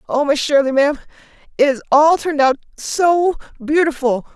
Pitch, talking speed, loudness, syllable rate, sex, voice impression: 290 Hz, 150 wpm, -16 LUFS, 5.4 syllables/s, female, feminine, very adult-like, slightly intellectual, calm, slightly friendly, slightly elegant